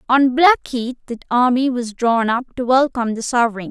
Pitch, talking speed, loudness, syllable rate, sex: 245 Hz, 180 wpm, -17 LUFS, 5.2 syllables/s, female